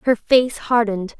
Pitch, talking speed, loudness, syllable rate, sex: 225 Hz, 150 wpm, -18 LUFS, 4.8 syllables/s, female